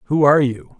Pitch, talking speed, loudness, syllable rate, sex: 135 Hz, 225 wpm, -16 LUFS, 6.8 syllables/s, male